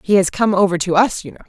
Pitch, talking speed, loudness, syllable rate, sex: 190 Hz, 325 wpm, -16 LUFS, 6.9 syllables/s, female